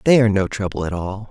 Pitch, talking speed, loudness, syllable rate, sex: 100 Hz, 275 wpm, -20 LUFS, 6.7 syllables/s, male